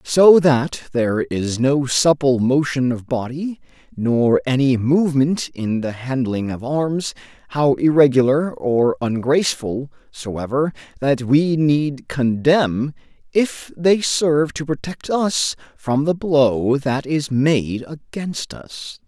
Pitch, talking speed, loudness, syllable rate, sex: 140 Hz, 125 wpm, -19 LUFS, 3.5 syllables/s, male